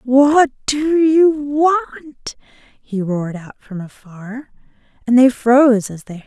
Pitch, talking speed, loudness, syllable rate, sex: 255 Hz, 145 wpm, -15 LUFS, 3.6 syllables/s, female